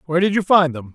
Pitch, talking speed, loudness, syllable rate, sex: 165 Hz, 315 wpm, -17 LUFS, 7.4 syllables/s, male